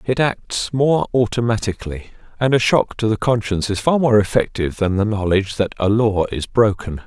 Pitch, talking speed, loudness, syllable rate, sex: 110 Hz, 185 wpm, -18 LUFS, 5.4 syllables/s, male